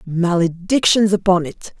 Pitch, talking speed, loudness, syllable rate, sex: 180 Hz, 100 wpm, -16 LUFS, 4.2 syllables/s, female